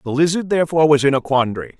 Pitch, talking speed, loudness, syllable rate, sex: 145 Hz, 235 wpm, -17 LUFS, 7.7 syllables/s, male